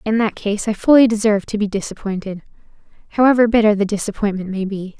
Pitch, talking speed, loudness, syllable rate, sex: 210 Hz, 180 wpm, -17 LUFS, 6.5 syllables/s, female